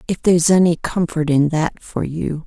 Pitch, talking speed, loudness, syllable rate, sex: 165 Hz, 195 wpm, -17 LUFS, 4.8 syllables/s, female